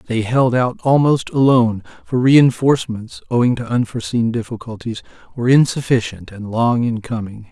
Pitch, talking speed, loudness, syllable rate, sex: 120 Hz, 135 wpm, -17 LUFS, 5.1 syllables/s, male